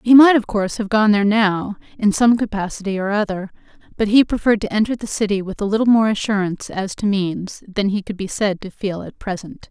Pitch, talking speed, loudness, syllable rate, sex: 205 Hz, 230 wpm, -18 LUFS, 5.9 syllables/s, female